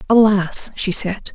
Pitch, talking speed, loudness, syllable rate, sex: 200 Hz, 135 wpm, -17 LUFS, 3.5 syllables/s, female